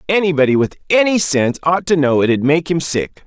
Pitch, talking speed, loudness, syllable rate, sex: 160 Hz, 200 wpm, -15 LUFS, 5.4 syllables/s, male